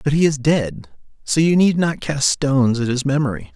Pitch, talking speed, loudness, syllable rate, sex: 140 Hz, 220 wpm, -18 LUFS, 5.1 syllables/s, male